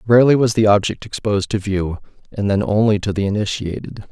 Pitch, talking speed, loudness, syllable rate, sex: 105 Hz, 190 wpm, -18 LUFS, 6.1 syllables/s, male